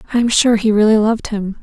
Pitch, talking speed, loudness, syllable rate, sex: 220 Hz, 260 wpm, -14 LUFS, 6.7 syllables/s, female